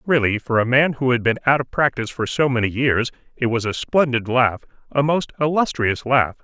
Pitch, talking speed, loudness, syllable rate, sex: 125 Hz, 215 wpm, -19 LUFS, 5.4 syllables/s, male